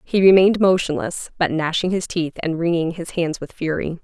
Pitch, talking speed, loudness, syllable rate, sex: 170 Hz, 195 wpm, -19 LUFS, 5.3 syllables/s, female